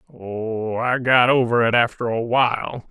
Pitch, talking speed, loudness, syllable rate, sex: 120 Hz, 165 wpm, -19 LUFS, 4.3 syllables/s, male